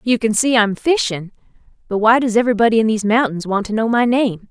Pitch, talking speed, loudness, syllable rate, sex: 225 Hz, 225 wpm, -16 LUFS, 6.2 syllables/s, female